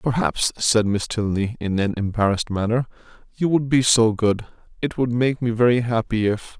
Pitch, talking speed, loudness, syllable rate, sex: 115 Hz, 175 wpm, -21 LUFS, 5.1 syllables/s, male